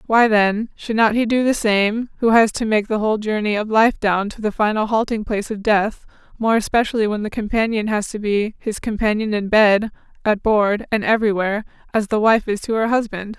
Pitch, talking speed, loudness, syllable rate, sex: 215 Hz, 215 wpm, -19 LUFS, 5.4 syllables/s, female